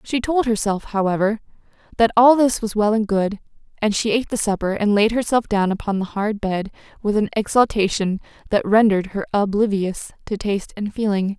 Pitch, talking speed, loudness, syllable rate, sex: 210 Hz, 185 wpm, -20 LUFS, 5.4 syllables/s, female